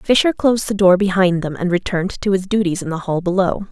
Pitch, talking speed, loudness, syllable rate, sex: 190 Hz, 240 wpm, -17 LUFS, 6.0 syllables/s, female